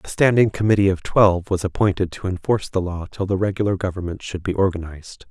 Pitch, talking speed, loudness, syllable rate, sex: 95 Hz, 205 wpm, -20 LUFS, 6.4 syllables/s, male